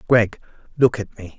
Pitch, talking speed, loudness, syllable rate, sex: 110 Hz, 175 wpm, -20 LUFS, 4.8 syllables/s, male